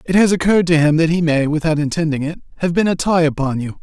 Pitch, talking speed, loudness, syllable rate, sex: 160 Hz, 265 wpm, -16 LUFS, 6.6 syllables/s, male